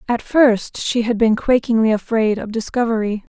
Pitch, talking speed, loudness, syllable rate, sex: 225 Hz, 160 wpm, -18 LUFS, 4.9 syllables/s, female